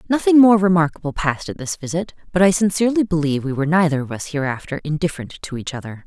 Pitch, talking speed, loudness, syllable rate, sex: 165 Hz, 210 wpm, -19 LUFS, 7.1 syllables/s, female